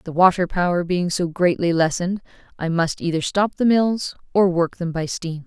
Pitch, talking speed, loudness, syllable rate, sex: 175 Hz, 195 wpm, -20 LUFS, 5.0 syllables/s, female